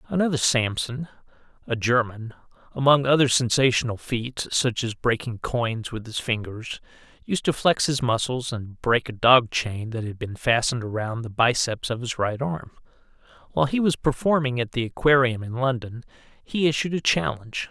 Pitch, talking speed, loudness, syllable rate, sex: 125 Hz, 165 wpm, -23 LUFS, 4.9 syllables/s, male